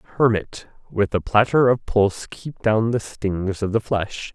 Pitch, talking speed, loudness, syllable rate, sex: 105 Hz, 180 wpm, -21 LUFS, 4.3 syllables/s, male